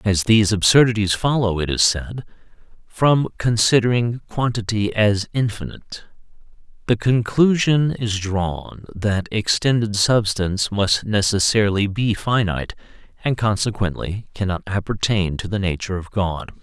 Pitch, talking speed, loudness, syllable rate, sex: 105 Hz, 115 wpm, -19 LUFS, 4.6 syllables/s, male